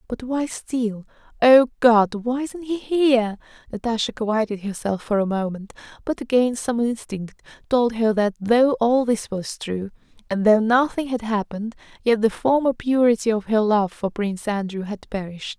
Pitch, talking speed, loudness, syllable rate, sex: 225 Hz, 170 wpm, -21 LUFS, 4.7 syllables/s, female